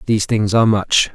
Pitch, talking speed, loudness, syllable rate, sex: 110 Hz, 210 wpm, -15 LUFS, 6.2 syllables/s, male